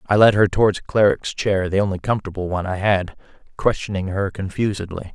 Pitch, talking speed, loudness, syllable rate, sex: 100 Hz, 175 wpm, -20 LUFS, 6.0 syllables/s, male